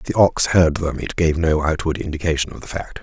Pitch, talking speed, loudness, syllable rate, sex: 80 Hz, 260 wpm, -19 LUFS, 5.9 syllables/s, male